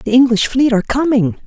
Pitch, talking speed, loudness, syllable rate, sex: 240 Hz, 205 wpm, -14 LUFS, 6.4 syllables/s, male